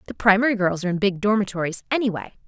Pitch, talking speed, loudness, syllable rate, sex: 200 Hz, 195 wpm, -21 LUFS, 7.4 syllables/s, female